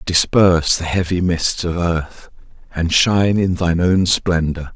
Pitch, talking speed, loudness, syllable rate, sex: 90 Hz, 150 wpm, -16 LUFS, 4.3 syllables/s, male